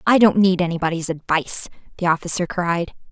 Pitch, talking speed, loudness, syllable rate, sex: 175 Hz, 155 wpm, -19 LUFS, 5.9 syllables/s, female